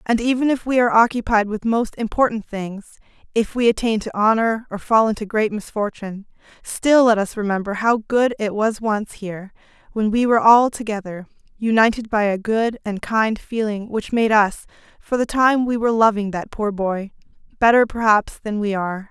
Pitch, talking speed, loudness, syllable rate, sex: 220 Hz, 180 wpm, -19 LUFS, 5.2 syllables/s, female